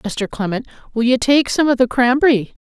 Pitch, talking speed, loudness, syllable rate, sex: 245 Hz, 205 wpm, -16 LUFS, 5.0 syllables/s, female